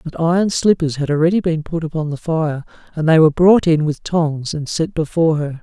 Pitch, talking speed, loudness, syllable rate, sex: 160 Hz, 225 wpm, -17 LUFS, 5.5 syllables/s, male